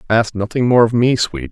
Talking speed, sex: 235 wpm, male